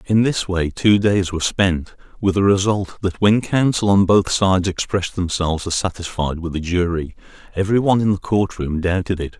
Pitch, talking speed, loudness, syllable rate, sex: 95 Hz, 200 wpm, -19 LUFS, 5.4 syllables/s, male